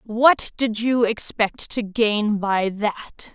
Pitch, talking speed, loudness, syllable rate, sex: 220 Hz, 145 wpm, -21 LUFS, 2.8 syllables/s, female